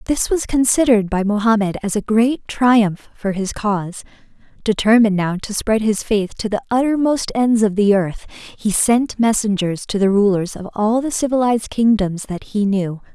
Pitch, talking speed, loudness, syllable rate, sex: 215 Hz, 180 wpm, -17 LUFS, 4.8 syllables/s, female